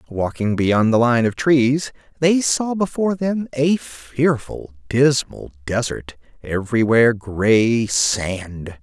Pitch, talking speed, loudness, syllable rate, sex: 125 Hz, 115 wpm, -18 LUFS, 3.5 syllables/s, male